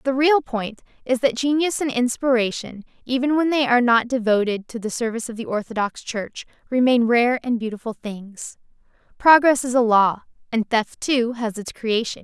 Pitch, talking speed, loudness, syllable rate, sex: 240 Hz, 170 wpm, -20 LUFS, 5.0 syllables/s, female